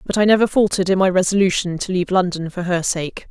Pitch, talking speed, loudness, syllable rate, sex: 185 Hz, 235 wpm, -18 LUFS, 6.5 syllables/s, female